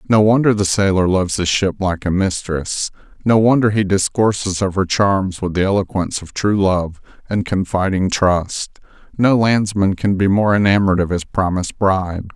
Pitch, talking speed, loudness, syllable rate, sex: 95 Hz, 175 wpm, -17 LUFS, 5.0 syllables/s, male